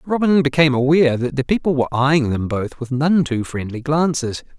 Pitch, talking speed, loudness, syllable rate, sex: 140 Hz, 195 wpm, -18 LUFS, 5.5 syllables/s, male